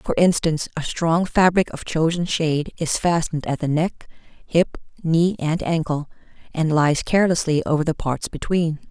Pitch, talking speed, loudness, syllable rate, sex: 160 Hz, 160 wpm, -21 LUFS, 4.9 syllables/s, female